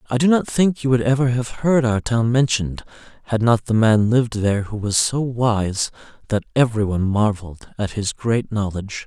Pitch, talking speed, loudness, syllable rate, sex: 115 Hz, 190 wpm, -19 LUFS, 5.2 syllables/s, male